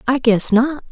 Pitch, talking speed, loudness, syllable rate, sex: 250 Hz, 195 wpm, -15 LUFS, 4.2 syllables/s, female